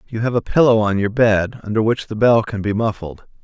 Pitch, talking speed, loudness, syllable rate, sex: 110 Hz, 245 wpm, -17 LUFS, 5.6 syllables/s, male